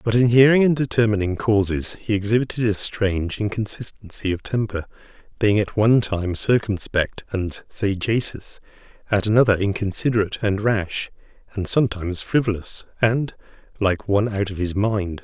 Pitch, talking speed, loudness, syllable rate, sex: 105 Hz, 140 wpm, -21 LUFS, 5.2 syllables/s, male